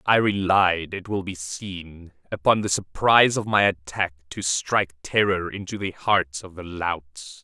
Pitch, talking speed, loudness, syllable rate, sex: 95 Hz, 170 wpm, -23 LUFS, 4.2 syllables/s, male